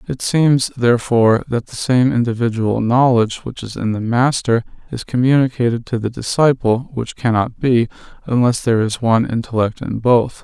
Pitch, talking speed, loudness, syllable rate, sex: 120 Hz, 160 wpm, -17 LUFS, 5.2 syllables/s, male